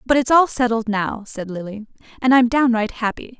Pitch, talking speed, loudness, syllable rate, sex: 230 Hz, 195 wpm, -19 LUFS, 4.8 syllables/s, female